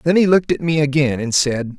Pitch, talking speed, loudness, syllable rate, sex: 145 Hz, 270 wpm, -17 LUFS, 5.9 syllables/s, male